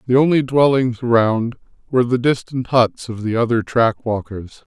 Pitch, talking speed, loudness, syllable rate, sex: 120 Hz, 165 wpm, -17 LUFS, 4.8 syllables/s, male